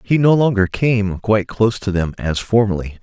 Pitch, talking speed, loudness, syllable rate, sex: 105 Hz, 200 wpm, -17 LUFS, 5.2 syllables/s, male